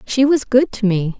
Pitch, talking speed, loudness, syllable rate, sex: 235 Hz, 250 wpm, -16 LUFS, 4.6 syllables/s, female